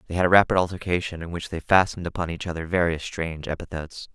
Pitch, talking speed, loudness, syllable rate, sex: 85 Hz, 215 wpm, -24 LUFS, 6.9 syllables/s, male